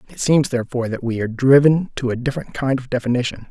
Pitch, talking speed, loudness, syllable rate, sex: 130 Hz, 220 wpm, -19 LUFS, 7.0 syllables/s, male